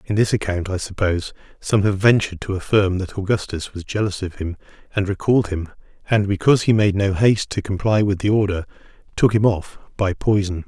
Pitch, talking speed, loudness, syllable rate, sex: 100 Hz, 195 wpm, -20 LUFS, 5.9 syllables/s, male